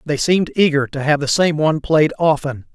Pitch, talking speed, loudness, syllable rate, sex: 150 Hz, 220 wpm, -16 LUFS, 5.7 syllables/s, male